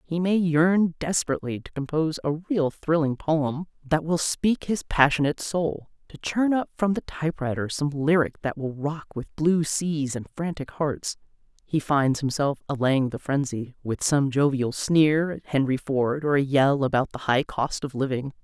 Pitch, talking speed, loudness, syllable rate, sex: 150 Hz, 180 wpm, -25 LUFS, 4.6 syllables/s, female